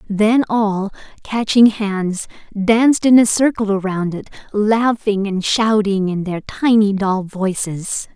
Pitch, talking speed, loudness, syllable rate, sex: 205 Hz, 130 wpm, -16 LUFS, 3.6 syllables/s, female